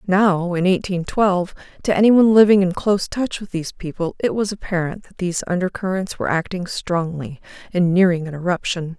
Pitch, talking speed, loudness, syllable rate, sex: 185 Hz, 175 wpm, -19 LUFS, 5.6 syllables/s, female